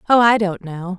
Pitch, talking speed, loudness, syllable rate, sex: 195 Hz, 245 wpm, -16 LUFS, 4.9 syllables/s, female